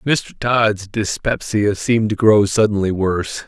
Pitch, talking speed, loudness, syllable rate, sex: 105 Hz, 140 wpm, -17 LUFS, 4.3 syllables/s, male